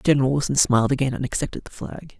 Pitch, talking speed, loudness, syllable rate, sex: 130 Hz, 220 wpm, -21 LUFS, 7.0 syllables/s, male